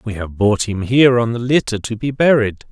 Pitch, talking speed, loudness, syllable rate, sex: 115 Hz, 245 wpm, -16 LUFS, 5.4 syllables/s, male